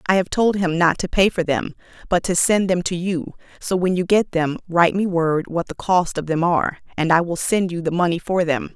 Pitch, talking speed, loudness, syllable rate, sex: 175 Hz, 260 wpm, -20 LUFS, 5.3 syllables/s, female